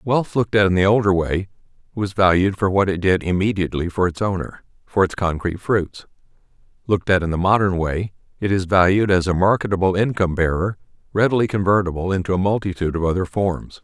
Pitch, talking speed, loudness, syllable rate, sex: 95 Hz, 185 wpm, -19 LUFS, 6.2 syllables/s, male